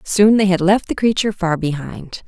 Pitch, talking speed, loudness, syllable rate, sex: 190 Hz, 210 wpm, -16 LUFS, 5.1 syllables/s, female